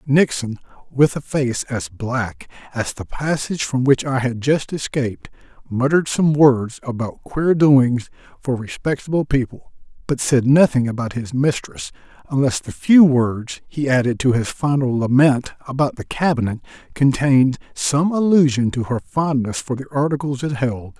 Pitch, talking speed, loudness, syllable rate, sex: 130 Hz, 155 wpm, -19 LUFS, 4.6 syllables/s, male